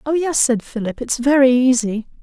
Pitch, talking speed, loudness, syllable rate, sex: 255 Hz, 190 wpm, -17 LUFS, 5.0 syllables/s, female